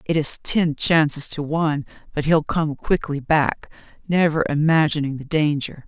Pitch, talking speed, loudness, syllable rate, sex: 150 Hz, 155 wpm, -20 LUFS, 4.6 syllables/s, female